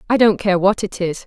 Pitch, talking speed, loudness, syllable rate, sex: 195 Hz, 285 wpm, -17 LUFS, 5.5 syllables/s, female